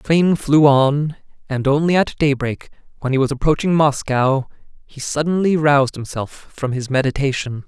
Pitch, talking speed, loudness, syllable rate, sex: 140 Hz, 155 wpm, -18 LUFS, 4.9 syllables/s, male